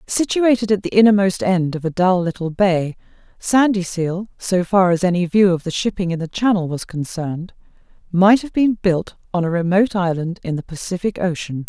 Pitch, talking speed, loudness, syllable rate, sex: 185 Hz, 175 wpm, -18 LUFS, 5.3 syllables/s, female